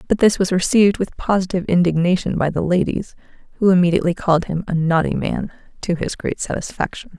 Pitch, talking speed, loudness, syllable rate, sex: 180 Hz, 175 wpm, -19 LUFS, 6.3 syllables/s, female